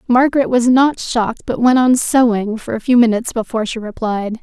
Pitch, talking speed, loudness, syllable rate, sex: 235 Hz, 205 wpm, -15 LUFS, 5.7 syllables/s, female